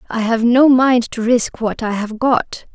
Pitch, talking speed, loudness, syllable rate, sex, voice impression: 235 Hz, 220 wpm, -15 LUFS, 4.0 syllables/s, female, very feminine, young, very thin, tensed, slightly powerful, bright, slightly hard, very clear, fluent, very cute, slightly intellectual, refreshing, slightly sincere, slightly calm, very friendly, reassuring, unique, very elegant, sweet, slightly lively, kind